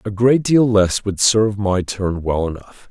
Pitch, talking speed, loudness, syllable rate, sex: 105 Hz, 205 wpm, -17 LUFS, 4.3 syllables/s, male